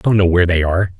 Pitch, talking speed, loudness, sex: 90 Hz, 365 wpm, -15 LUFS, male